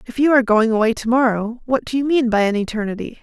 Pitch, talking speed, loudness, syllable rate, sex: 235 Hz, 260 wpm, -18 LUFS, 6.5 syllables/s, female